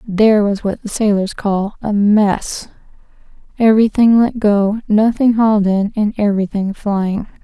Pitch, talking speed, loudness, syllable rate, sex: 210 Hz, 130 wpm, -15 LUFS, 4.5 syllables/s, female